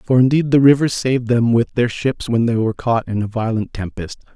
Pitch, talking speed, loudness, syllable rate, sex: 120 Hz, 235 wpm, -17 LUFS, 5.6 syllables/s, male